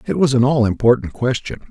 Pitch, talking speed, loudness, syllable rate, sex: 125 Hz, 210 wpm, -17 LUFS, 5.9 syllables/s, male